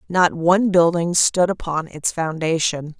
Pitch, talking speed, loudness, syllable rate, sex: 170 Hz, 140 wpm, -19 LUFS, 4.3 syllables/s, female